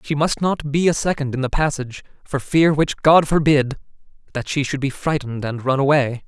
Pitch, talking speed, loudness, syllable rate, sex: 140 Hz, 190 wpm, -19 LUFS, 5.4 syllables/s, male